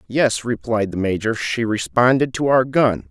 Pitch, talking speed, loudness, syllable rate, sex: 115 Hz, 175 wpm, -19 LUFS, 4.4 syllables/s, male